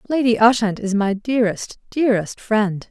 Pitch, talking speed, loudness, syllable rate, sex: 220 Hz, 145 wpm, -19 LUFS, 5.0 syllables/s, female